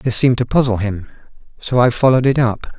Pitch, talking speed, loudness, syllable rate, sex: 120 Hz, 215 wpm, -15 LUFS, 6.3 syllables/s, male